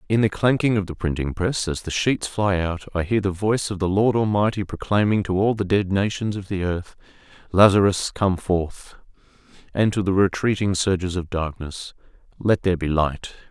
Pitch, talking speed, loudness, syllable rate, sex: 95 Hz, 180 wpm, -22 LUFS, 5.1 syllables/s, male